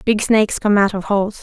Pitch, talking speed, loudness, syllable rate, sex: 205 Hz, 255 wpm, -16 LUFS, 6.0 syllables/s, female